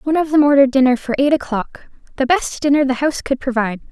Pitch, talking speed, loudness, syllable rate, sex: 270 Hz, 230 wpm, -16 LUFS, 6.9 syllables/s, female